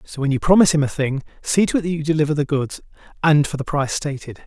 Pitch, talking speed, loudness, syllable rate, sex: 150 Hz, 270 wpm, -19 LUFS, 7.0 syllables/s, male